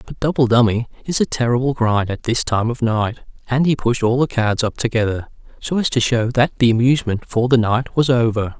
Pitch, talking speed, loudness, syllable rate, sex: 120 Hz, 225 wpm, -18 LUFS, 5.5 syllables/s, male